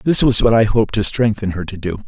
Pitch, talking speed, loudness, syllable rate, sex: 110 Hz, 290 wpm, -16 LUFS, 6.2 syllables/s, male